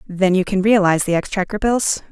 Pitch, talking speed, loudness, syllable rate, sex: 195 Hz, 200 wpm, -17 LUFS, 5.8 syllables/s, female